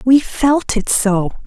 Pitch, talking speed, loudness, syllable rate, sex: 240 Hz, 165 wpm, -15 LUFS, 3.2 syllables/s, female